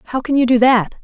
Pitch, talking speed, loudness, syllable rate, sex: 245 Hz, 290 wpm, -14 LUFS, 6.9 syllables/s, female